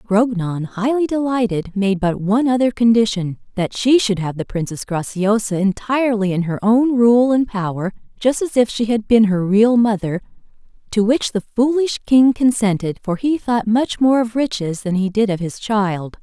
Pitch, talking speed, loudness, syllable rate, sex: 215 Hz, 180 wpm, -17 LUFS, 4.7 syllables/s, female